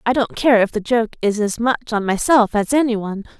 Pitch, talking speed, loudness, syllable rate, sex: 225 Hz, 250 wpm, -18 LUFS, 5.5 syllables/s, female